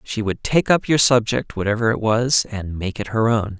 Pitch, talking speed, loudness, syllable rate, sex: 115 Hz, 235 wpm, -19 LUFS, 4.9 syllables/s, male